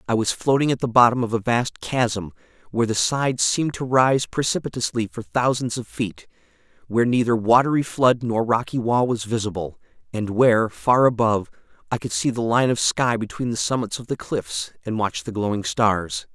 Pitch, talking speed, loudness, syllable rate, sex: 115 Hz, 190 wpm, -21 LUFS, 5.3 syllables/s, male